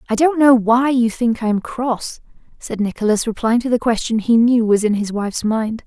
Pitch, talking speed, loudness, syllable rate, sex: 230 Hz, 225 wpm, -17 LUFS, 5.1 syllables/s, female